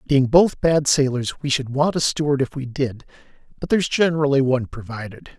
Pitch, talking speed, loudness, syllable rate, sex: 140 Hz, 190 wpm, -20 LUFS, 5.6 syllables/s, male